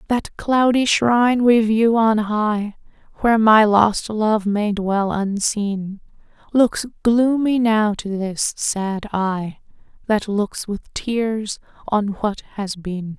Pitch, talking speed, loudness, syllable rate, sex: 215 Hz, 130 wpm, -19 LUFS, 3.1 syllables/s, female